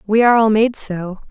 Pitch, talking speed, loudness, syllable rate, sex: 215 Hz, 230 wpm, -15 LUFS, 5.5 syllables/s, female